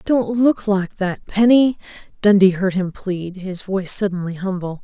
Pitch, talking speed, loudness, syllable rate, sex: 195 Hz, 160 wpm, -18 LUFS, 4.4 syllables/s, female